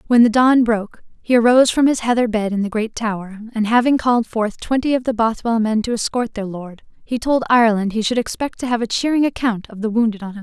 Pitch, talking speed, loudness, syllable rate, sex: 230 Hz, 255 wpm, -18 LUFS, 6.3 syllables/s, female